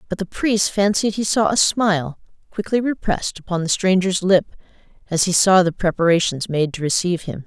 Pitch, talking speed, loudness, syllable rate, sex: 185 Hz, 185 wpm, -19 LUFS, 5.5 syllables/s, female